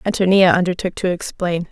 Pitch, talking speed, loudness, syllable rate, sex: 180 Hz, 140 wpm, -17 LUFS, 5.6 syllables/s, female